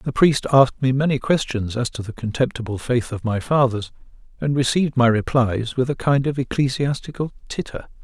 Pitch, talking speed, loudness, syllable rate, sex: 125 Hz, 180 wpm, -21 LUFS, 5.4 syllables/s, male